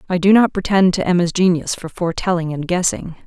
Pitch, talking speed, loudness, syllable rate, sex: 180 Hz, 200 wpm, -17 LUFS, 5.9 syllables/s, female